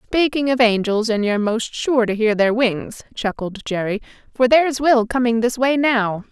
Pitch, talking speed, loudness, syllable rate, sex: 235 Hz, 190 wpm, -18 LUFS, 4.8 syllables/s, female